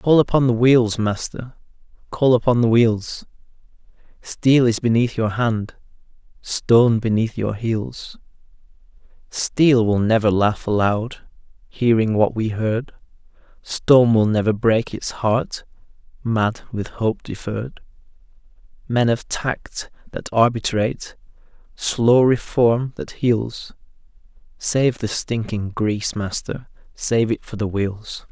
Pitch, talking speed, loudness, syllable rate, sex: 115 Hz, 120 wpm, -19 LUFS, 3.7 syllables/s, male